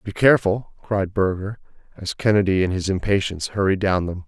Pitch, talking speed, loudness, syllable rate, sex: 95 Hz, 170 wpm, -21 LUFS, 5.6 syllables/s, male